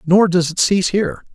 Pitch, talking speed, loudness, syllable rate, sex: 185 Hz, 225 wpm, -16 LUFS, 6.1 syllables/s, male